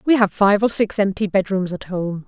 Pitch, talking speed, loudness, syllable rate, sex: 200 Hz, 265 wpm, -19 LUFS, 5.1 syllables/s, female